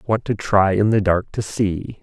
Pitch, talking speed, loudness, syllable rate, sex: 100 Hz, 235 wpm, -19 LUFS, 4.2 syllables/s, male